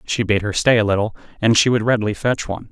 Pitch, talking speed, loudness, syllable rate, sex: 110 Hz, 265 wpm, -18 LUFS, 6.9 syllables/s, male